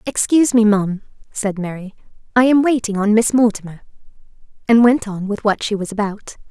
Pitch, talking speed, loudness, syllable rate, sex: 215 Hz, 175 wpm, -16 LUFS, 5.7 syllables/s, female